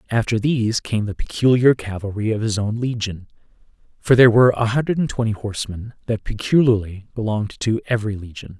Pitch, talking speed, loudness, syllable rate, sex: 110 Hz, 170 wpm, -20 LUFS, 6.1 syllables/s, male